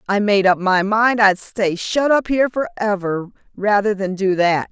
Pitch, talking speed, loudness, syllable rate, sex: 205 Hz, 190 wpm, -17 LUFS, 4.4 syllables/s, female